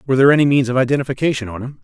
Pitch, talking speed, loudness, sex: 130 Hz, 260 wpm, -16 LUFS, male